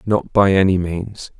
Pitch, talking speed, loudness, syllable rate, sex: 95 Hz, 170 wpm, -17 LUFS, 4.1 syllables/s, male